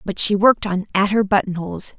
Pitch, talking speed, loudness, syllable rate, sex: 195 Hz, 210 wpm, -18 LUFS, 6.1 syllables/s, female